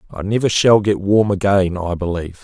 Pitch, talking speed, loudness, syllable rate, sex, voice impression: 95 Hz, 195 wpm, -16 LUFS, 5.4 syllables/s, male, very masculine, very adult-like, slightly thick, cool, slightly intellectual, slightly calm